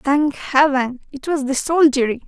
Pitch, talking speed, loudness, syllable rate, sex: 280 Hz, 160 wpm, -18 LUFS, 4.4 syllables/s, female